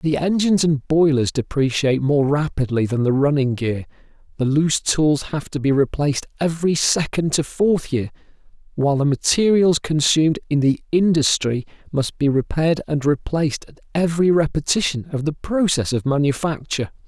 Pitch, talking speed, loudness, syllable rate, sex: 150 Hz, 150 wpm, -19 LUFS, 5.3 syllables/s, male